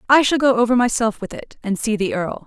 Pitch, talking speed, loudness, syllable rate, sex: 230 Hz, 270 wpm, -18 LUFS, 5.8 syllables/s, female